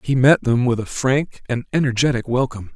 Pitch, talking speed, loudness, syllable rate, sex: 125 Hz, 195 wpm, -19 LUFS, 5.6 syllables/s, male